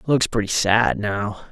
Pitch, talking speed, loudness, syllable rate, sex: 110 Hz, 160 wpm, -20 LUFS, 3.9 syllables/s, male